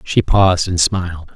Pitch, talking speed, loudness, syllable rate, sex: 85 Hz, 175 wpm, -15 LUFS, 4.8 syllables/s, male